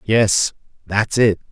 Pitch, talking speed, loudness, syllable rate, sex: 105 Hz, 120 wpm, -18 LUFS, 2.9 syllables/s, male